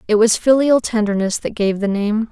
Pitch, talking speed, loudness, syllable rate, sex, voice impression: 220 Hz, 205 wpm, -17 LUFS, 5.1 syllables/s, female, very feminine, adult-like, slightly thin, slightly relaxed, powerful, slightly dark, slightly soft, clear, fluent, slightly raspy, cute, intellectual, refreshing, sincere, calm, friendly, reassuring, slightly unique, slightly elegant, slightly wild, sweet, slightly lively, kind, modest